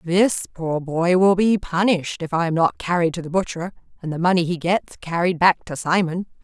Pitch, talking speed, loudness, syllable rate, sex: 175 Hz, 215 wpm, -20 LUFS, 5.1 syllables/s, female